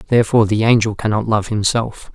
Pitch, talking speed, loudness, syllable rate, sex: 110 Hz, 170 wpm, -16 LUFS, 6.3 syllables/s, male